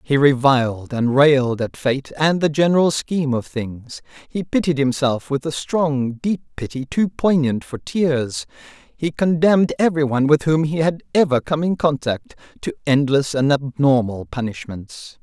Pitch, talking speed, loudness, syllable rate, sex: 140 Hz, 160 wpm, -19 LUFS, 4.6 syllables/s, male